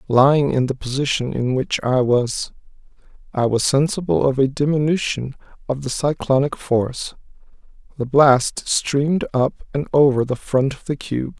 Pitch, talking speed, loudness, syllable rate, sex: 135 Hz, 155 wpm, -19 LUFS, 4.7 syllables/s, male